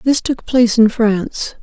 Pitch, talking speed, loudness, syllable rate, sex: 230 Hz, 185 wpm, -15 LUFS, 4.8 syllables/s, female